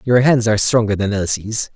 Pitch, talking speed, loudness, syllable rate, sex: 110 Hz, 205 wpm, -16 LUFS, 5.5 syllables/s, male